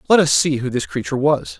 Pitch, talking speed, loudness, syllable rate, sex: 145 Hz, 265 wpm, -18 LUFS, 6.4 syllables/s, male